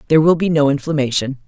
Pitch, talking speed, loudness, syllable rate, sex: 145 Hz, 205 wpm, -16 LUFS, 7.4 syllables/s, female